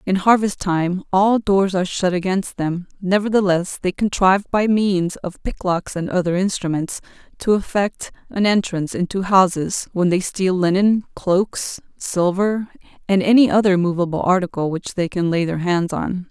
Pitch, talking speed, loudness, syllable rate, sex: 185 Hz, 160 wpm, -19 LUFS, 4.6 syllables/s, female